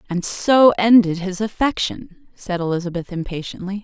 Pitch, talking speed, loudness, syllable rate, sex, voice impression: 195 Hz, 125 wpm, -19 LUFS, 4.8 syllables/s, female, feminine, adult-like, tensed, bright, slightly soft, clear, friendly, lively, sharp